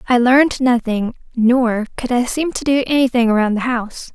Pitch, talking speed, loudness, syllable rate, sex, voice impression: 245 Hz, 190 wpm, -16 LUFS, 5.3 syllables/s, female, feminine, slightly young, tensed, bright, clear, slightly nasal, cute, friendly, slightly sweet, lively, kind